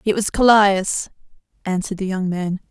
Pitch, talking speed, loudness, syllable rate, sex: 200 Hz, 155 wpm, -18 LUFS, 5.0 syllables/s, female